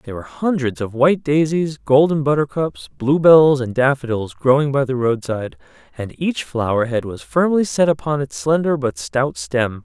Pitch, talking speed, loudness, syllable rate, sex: 135 Hz, 170 wpm, -18 LUFS, 4.9 syllables/s, male